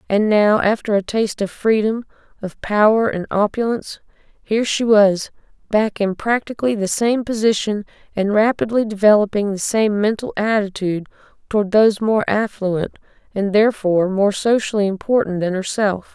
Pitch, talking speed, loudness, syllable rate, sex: 210 Hz, 140 wpm, -18 LUFS, 5.2 syllables/s, female